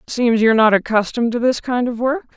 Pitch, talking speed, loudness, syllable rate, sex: 235 Hz, 230 wpm, -17 LUFS, 6.1 syllables/s, female